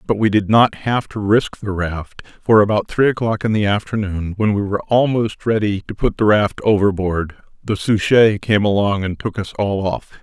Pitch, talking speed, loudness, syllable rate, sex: 105 Hz, 205 wpm, -17 LUFS, 4.9 syllables/s, male